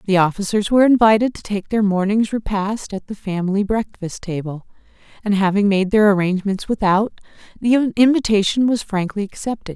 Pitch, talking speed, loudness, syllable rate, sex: 205 Hz, 155 wpm, -18 LUFS, 5.4 syllables/s, female